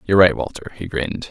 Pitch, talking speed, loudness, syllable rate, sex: 90 Hz, 230 wpm, -19 LUFS, 7.2 syllables/s, male